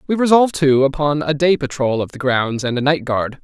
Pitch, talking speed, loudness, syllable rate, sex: 140 Hz, 245 wpm, -17 LUFS, 5.5 syllables/s, male